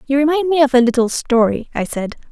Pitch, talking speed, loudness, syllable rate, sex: 265 Hz, 235 wpm, -16 LUFS, 6.2 syllables/s, female